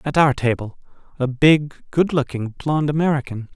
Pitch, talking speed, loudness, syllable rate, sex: 140 Hz, 135 wpm, -20 LUFS, 4.6 syllables/s, male